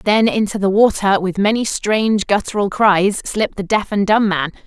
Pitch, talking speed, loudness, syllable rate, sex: 205 Hz, 195 wpm, -16 LUFS, 5.1 syllables/s, female